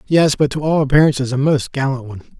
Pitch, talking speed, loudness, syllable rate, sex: 140 Hz, 225 wpm, -16 LUFS, 6.6 syllables/s, male